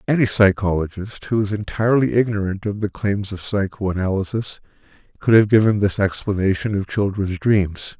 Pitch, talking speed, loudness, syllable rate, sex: 100 Hz, 145 wpm, -20 LUFS, 5.1 syllables/s, male